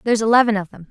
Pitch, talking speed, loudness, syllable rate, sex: 215 Hz, 265 wpm, -17 LUFS, 8.9 syllables/s, female